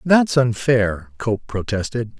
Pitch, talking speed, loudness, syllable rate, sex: 115 Hz, 110 wpm, -20 LUFS, 3.6 syllables/s, male